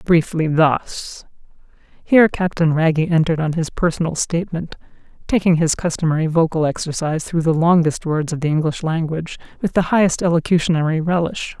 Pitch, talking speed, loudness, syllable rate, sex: 165 Hz, 145 wpm, -18 LUFS, 5.6 syllables/s, female